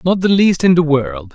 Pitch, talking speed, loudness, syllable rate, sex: 175 Hz, 270 wpm, -13 LUFS, 4.8 syllables/s, male